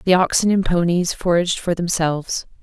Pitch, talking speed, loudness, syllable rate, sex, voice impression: 175 Hz, 160 wpm, -19 LUFS, 5.5 syllables/s, female, very feminine, adult-like, thin, tensed, slightly weak, slightly bright, soft, clear, fluent, cute, intellectual, refreshing, very sincere, calm, very friendly, very reassuring, slightly unique, elegant, slightly wild, sweet, lively, kind, slightly modest, slightly light